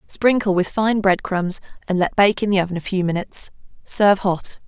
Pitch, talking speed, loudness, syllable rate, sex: 195 Hz, 205 wpm, -19 LUFS, 5.4 syllables/s, female